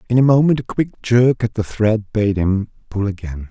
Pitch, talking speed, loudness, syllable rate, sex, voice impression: 110 Hz, 220 wpm, -18 LUFS, 5.1 syllables/s, male, very masculine, adult-like, soft, slightly muffled, sincere, very calm, slightly sweet